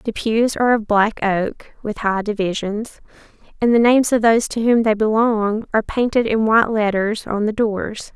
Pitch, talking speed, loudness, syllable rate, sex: 220 Hz, 190 wpm, -18 LUFS, 5.0 syllables/s, female